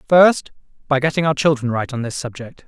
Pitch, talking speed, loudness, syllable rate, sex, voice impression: 140 Hz, 200 wpm, -18 LUFS, 5.6 syllables/s, male, very masculine, slightly young, very adult-like, slightly thick, slightly tensed, slightly powerful, bright, hard, clear, fluent, slightly cool, intellectual, very refreshing, sincere, slightly calm, slightly friendly, slightly reassuring, unique, slightly wild, slightly sweet, lively, slightly intense, slightly sharp, light